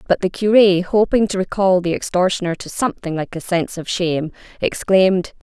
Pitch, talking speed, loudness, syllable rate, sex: 185 Hz, 175 wpm, -18 LUFS, 5.5 syllables/s, female